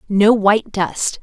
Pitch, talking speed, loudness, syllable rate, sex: 205 Hz, 145 wpm, -16 LUFS, 3.8 syllables/s, female